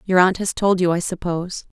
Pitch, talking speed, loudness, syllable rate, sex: 180 Hz, 235 wpm, -20 LUFS, 5.7 syllables/s, female